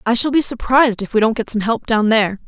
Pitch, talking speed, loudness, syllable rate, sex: 230 Hz, 290 wpm, -16 LUFS, 6.5 syllables/s, female